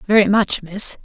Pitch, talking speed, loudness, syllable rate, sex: 200 Hz, 175 wpm, -17 LUFS, 4.4 syllables/s, female